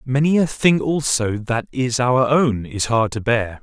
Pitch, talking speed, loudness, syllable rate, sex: 125 Hz, 200 wpm, -19 LUFS, 4.0 syllables/s, male